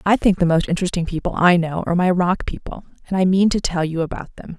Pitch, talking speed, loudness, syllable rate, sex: 175 Hz, 260 wpm, -19 LUFS, 6.4 syllables/s, female